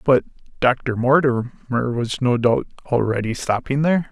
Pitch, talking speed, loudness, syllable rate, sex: 125 Hz, 130 wpm, -20 LUFS, 4.6 syllables/s, male